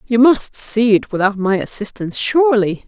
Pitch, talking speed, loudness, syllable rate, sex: 220 Hz, 165 wpm, -16 LUFS, 5.1 syllables/s, female